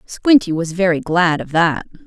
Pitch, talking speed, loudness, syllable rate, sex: 180 Hz, 175 wpm, -16 LUFS, 4.6 syllables/s, female